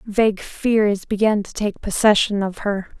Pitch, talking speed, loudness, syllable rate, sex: 205 Hz, 160 wpm, -19 LUFS, 4.3 syllables/s, female